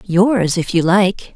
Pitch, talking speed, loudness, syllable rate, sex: 190 Hz, 180 wpm, -15 LUFS, 3.2 syllables/s, female